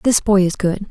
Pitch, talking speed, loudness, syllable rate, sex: 195 Hz, 265 wpm, -16 LUFS, 5.0 syllables/s, female